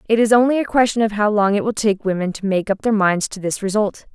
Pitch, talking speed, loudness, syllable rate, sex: 210 Hz, 290 wpm, -18 LUFS, 6.1 syllables/s, female